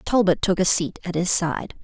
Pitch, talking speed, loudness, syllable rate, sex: 180 Hz, 230 wpm, -21 LUFS, 4.9 syllables/s, female